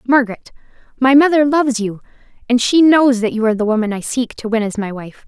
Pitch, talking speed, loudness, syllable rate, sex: 240 Hz, 225 wpm, -15 LUFS, 6.3 syllables/s, female